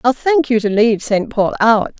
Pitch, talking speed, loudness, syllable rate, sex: 225 Hz, 240 wpm, -15 LUFS, 5.0 syllables/s, female